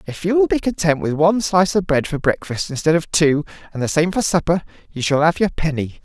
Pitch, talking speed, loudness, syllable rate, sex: 155 Hz, 250 wpm, -18 LUFS, 6.0 syllables/s, male